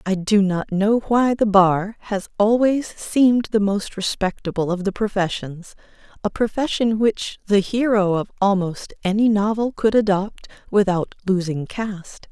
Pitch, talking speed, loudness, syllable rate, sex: 205 Hz, 145 wpm, -20 LUFS, 4.3 syllables/s, female